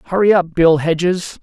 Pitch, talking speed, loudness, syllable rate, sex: 175 Hz, 170 wpm, -15 LUFS, 5.1 syllables/s, male